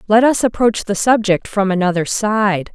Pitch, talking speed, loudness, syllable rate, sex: 205 Hz, 175 wpm, -16 LUFS, 4.7 syllables/s, female